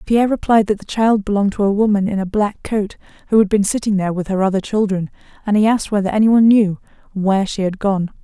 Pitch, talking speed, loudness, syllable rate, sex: 205 Hz, 235 wpm, -17 LUFS, 6.6 syllables/s, female